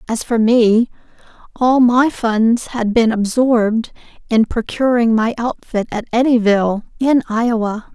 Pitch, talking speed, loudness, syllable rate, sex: 230 Hz, 130 wpm, -16 LUFS, 4.3 syllables/s, female